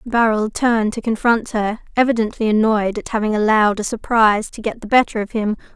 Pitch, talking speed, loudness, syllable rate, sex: 220 Hz, 190 wpm, -18 LUFS, 5.9 syllables/s, female